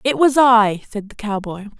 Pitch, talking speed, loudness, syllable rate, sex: 225 Hz, 200 wpm, -16 LUFS, 4.6 syllables/s, female